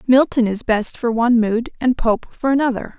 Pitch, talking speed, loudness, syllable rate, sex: 235 Hz, 200 wpm, -18 LUFS, 5.1 syllables/s, female